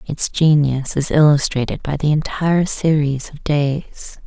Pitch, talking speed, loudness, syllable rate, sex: 145 Hz, 140 wpm, -17 LUFS, 4.1 syllables/s, female